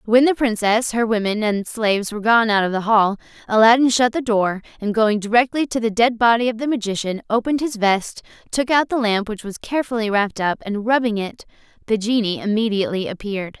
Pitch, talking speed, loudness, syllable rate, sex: 220 Hz, 205 wpm, -19 LUFS, 5.8 syllables/s, female